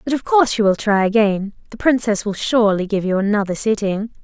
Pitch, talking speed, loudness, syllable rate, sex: 215 Hz, 215 wpm, -17 LUFS, 5.9 syllables/s, female